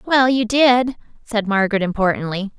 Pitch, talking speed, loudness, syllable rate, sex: 220 Hz, 140 wpm, -18 LUFS, 5.0 syllables/s, female